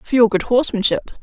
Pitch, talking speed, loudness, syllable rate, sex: 225 Hz, 195 wpm, -17 LUFS, 6.4 syllables/s, female